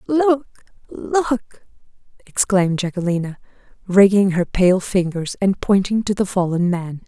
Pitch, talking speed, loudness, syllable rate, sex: 195 Hz, 110 wpm, -18 LUFS, 4.3 syllables/s, female